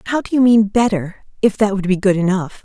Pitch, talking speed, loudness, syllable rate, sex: 205 Hz, 225 wpm, -16 LUFS, 5.9 syllables/s, female